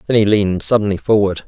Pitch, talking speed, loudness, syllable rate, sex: 105 Hz, 205 wpm, -15 LUFS, 7.0 syllables/s, male